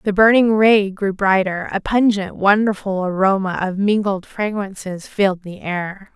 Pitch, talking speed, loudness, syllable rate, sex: 200 Hz, 135 wpm, -18 LUFS, 4.4 syllables/s, female